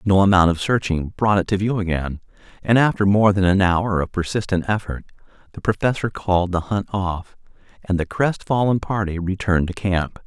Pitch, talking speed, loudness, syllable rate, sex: 95 Hz, 180 wpm, -20 LUFS, 5.3 syllables/s, male